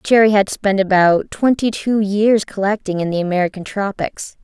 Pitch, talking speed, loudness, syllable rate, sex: 200 Hz, 160 wpm, -17 LUFS, 4.8 syllables/s, female